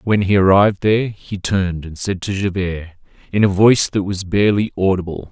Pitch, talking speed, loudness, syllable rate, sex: 95 Hz, 190 wpm, -17 LUFS, 5.7 syllables/s, male